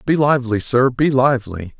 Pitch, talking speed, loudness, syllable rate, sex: 125 Hz, 165 wpm, -16 LUFS, 5.5 syllables/s, male